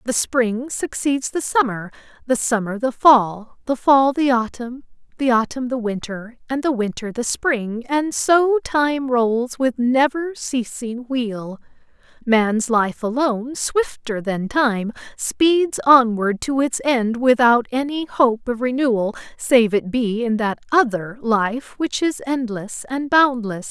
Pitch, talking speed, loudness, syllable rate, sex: 245 Hz, 145 wpm, -19 LUFS, 3.7 syllables/s, female